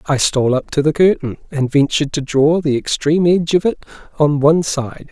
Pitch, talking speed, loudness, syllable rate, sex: 150 Hz, 210 wpm, -16 LUFS, 5.8 syllables/s, male